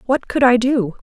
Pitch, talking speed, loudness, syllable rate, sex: 245 Hz, 220 wpm, -16 LUFS, 4.7 syllables/s, female